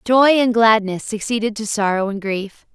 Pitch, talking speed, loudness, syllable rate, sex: 215 Hz, 175 wpm, -17 LUFS, 4.6 syllables/s, female